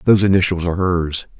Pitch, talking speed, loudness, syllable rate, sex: 90 Hz, 170 wpm, -17 LUFS, 6.8 syllables/s, male